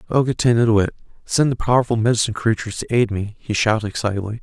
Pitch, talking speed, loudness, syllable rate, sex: 110 Hz, 175 wpm, -19 LUFS, 7.3 syllables/s, male